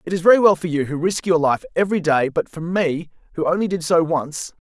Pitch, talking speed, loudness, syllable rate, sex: 170 Hz, 255 wpm, -19 LUFS, 5.8 syllables/s, male